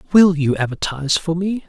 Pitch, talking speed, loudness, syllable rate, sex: 165 Hz, 180 wpm, -18 LUFS, 5.7 syllables/s, male